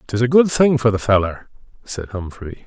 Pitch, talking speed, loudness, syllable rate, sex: 115 Hz, 205 wpm, -17 LUFS, 5.1 syllables/s, male